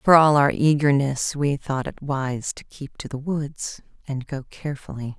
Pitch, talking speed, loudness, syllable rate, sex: 140 Hz, 185 wpm, -23 LUFS, 4.4 syllables/s, female